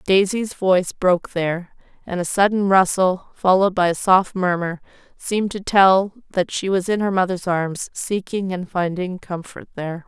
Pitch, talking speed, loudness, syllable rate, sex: 185 Hz, 165 wpm, -20 LUFS, 4.8 syllables/s, female